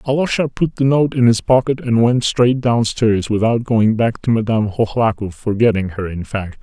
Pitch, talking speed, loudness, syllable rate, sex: 115 Hz, 190 wpm, -16 LUFS, 4.9 syllables/s, male